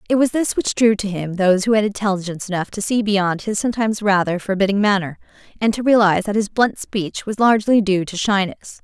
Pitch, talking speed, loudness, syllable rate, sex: 205 Hz, 215 wpm, -18 LUFS, 6.1 syllables/s, female